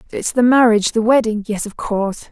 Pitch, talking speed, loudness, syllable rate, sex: 220 Hz, 210 wpm, -16 LUFS, 6.0 syllables/s, female